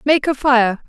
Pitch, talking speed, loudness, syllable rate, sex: 260 Hz, 205 wpm, -15 LUFS, 4.2 syllables/s, female